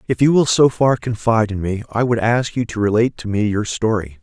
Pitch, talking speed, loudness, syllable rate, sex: 110 Hz, 255 wpm, -17 LUFS, 5.8 syllables/s, male